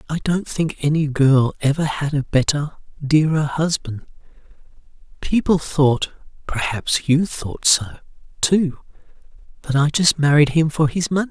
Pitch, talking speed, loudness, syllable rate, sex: 150 Hz, 140 wpm, -19 LUFS, 4.3 syllables/s, male